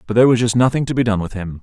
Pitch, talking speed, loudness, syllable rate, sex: 115 Hz, 370 wpm, -16 LUFS, 8.1 syllables/s, male